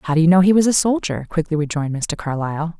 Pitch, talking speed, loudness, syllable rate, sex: 165 Hz, 260 wpm, -18 LUFS, 6.7 syllables/s, female